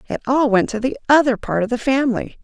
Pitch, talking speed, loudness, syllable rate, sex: 245 Hz, 245 wpm, -18 LUFS, 6.3 syllables/s, female